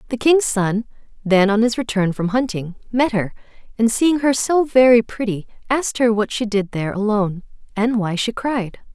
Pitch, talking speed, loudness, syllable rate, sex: 225 Hz, 190 wpm, -18 LUFS, 5.1 syllables/s, female